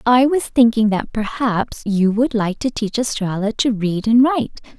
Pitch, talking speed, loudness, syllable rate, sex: 225 Hz, 190 wpm, -18 LUFS, 4.6 syllables/s, female